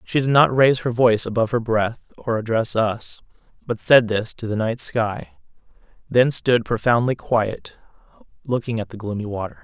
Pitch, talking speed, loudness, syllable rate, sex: 115 Hz, 175 wpm, -20 LUFS, 5.0 syllables/s, male